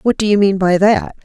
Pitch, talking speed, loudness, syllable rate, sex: 200 Hz, 290 wpm, -13 LUFS, 5.3 syllables/s, female